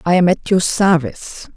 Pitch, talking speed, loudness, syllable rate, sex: 170 Hz, 190 wpm, -15 LUFS, 5.0 syllables/s, female